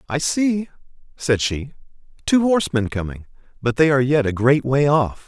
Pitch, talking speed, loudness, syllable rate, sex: 135 Hz, 170 wpm, -19 LUFS, 5.1 syllables/s, male